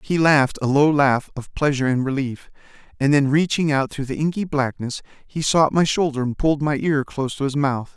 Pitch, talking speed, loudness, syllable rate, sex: 140 Hz, 220 wpm, -20 LUFS, 5.6 syllables/s, male